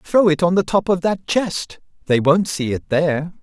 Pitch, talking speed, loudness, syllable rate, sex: 170 Hz, 230 wpm, -18 LUFS, 4.7 syllables/s, male